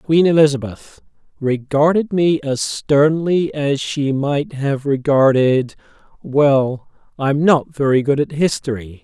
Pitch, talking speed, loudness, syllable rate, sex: 140 Hz, 115 wpm, -17 LUFS, 3.7 syllables/s, male